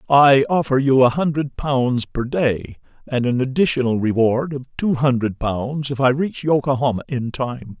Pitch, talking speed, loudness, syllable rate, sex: 135 Hz, 170 wpm, -19 LUFS, 4.5 syllables/s, male